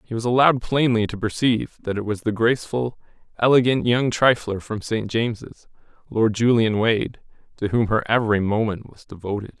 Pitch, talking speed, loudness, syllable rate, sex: 115 Hz, 170 wpm, -21 LUFS, 5.3 syllables/s, male